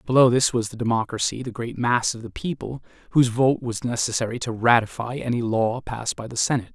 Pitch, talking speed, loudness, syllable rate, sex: 120 Hz, 205 wpm, -23 LUFS, 6.1 syllables/s, male